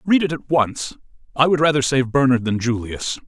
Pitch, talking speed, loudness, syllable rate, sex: 135 Hz, 200 wpm, -19 LUFS, 5.1 syllables/s, male